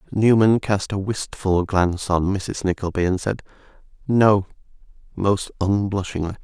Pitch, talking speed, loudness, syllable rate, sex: 95 Hz, 120 wpm, -21 LUFS, 4.4 syllables/s, male